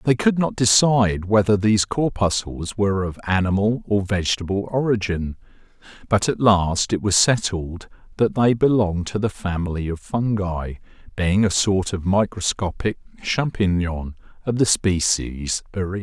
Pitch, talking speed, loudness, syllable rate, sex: 100 Hz, 140 wpm, -21 LUFS, 4.7 syllables/s, male